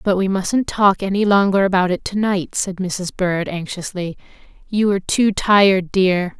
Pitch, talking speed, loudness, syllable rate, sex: 190 Hz, 180 wpm, -18 LUFS, 4.5 syllables/s, female